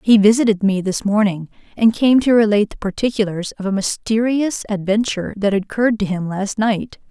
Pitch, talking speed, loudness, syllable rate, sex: 210 Hz, 175 wpm, -17 LUFS, 5.5 syllables/s, female